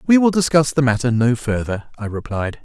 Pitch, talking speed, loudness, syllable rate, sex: 130 Hz, 205 wpm, -18 LUFS, 5.4 syllables/s, male